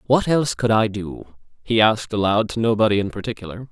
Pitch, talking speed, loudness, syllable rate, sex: 110 Hz, 195 wpm, -20 LUFS, 6.3 syllables/s, male